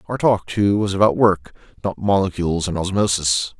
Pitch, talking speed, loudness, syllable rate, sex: 95 Hz, 165 wpm, -19 LUFS, 5.1 syllables/s, male